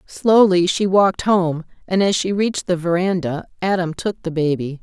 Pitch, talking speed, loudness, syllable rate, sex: 180 Hz, 175 wpm, -18 LUFS, 4.9 syllables/s, female